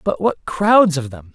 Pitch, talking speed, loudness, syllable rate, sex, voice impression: 165 Hz, 225 wpm, -16 LUFS, 4.0 syllables/s, male, masculine, adult-like, slightly halting, refreshing, slightly sincere, friendly